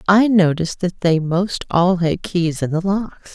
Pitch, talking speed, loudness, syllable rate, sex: 180 Hz, 195 wpm, -18 LUFS, 4.2 syllables/s, female